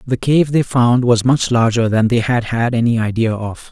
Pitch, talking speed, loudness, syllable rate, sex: 120 Hz, 225 wpm, -15 LUFS, 4.8 syllables/s, male